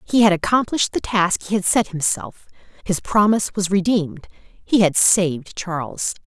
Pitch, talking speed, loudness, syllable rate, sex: 190 Hz, 165 wpm, -19 LUFS, 5.1 syllables/s, female